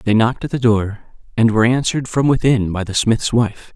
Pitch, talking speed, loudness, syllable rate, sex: 115 Hz, 225 wpm, -17 LUFS, 5.8 syllables/s, male